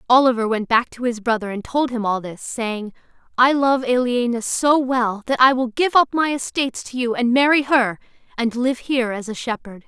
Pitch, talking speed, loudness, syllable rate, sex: 245 Hz, 215 wpm, -19 LUFS, 5.2 syllables/s, female